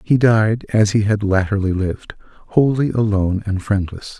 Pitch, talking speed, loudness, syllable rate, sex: 105 Hz, 145 wpm, -18 LUFS, 4.9 syllables/s, male